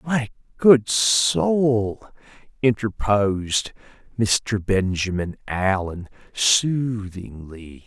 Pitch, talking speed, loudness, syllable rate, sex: 105 Hz, 60 wpm, -21 LUFS, 2.6 syllables/s, male